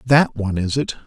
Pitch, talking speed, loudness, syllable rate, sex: 115 Hz, 225 wpm, -20 LUFS, 5.7 syllables/s, male